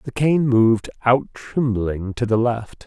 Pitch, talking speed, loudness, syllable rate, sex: 120 Hz, 170 wpm, -20 LUFS, 3.9 syllables/s, male